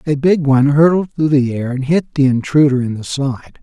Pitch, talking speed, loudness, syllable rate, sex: 140 Hz, 230 wpm, -15 LUFS, 5.2 syllables/s, male